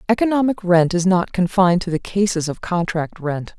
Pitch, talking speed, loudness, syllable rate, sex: 180 Hz, 185 wpm, -19 LUFS, 5.3 syllables/s, female